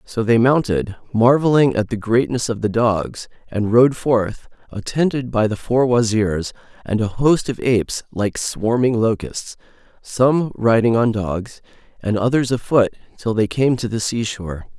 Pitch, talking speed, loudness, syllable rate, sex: 115 Hz, 160 wpm, -18 LUFS, 4.2 syllables/s, male